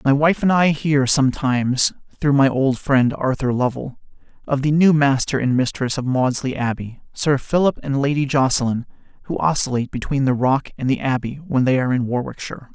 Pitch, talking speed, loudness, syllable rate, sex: 135 Hz, 185 wpm, -19 LUFS, 5.5 syllables/s, male